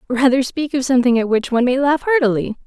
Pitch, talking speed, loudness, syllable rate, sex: 260 Hz, 225 wpm, -17 LUFS, 6.5 syllables/s, female